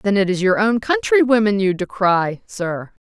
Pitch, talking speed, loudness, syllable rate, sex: 195 Hz, 175 wpm, -18 LUFS, 4.6 syllables/s, female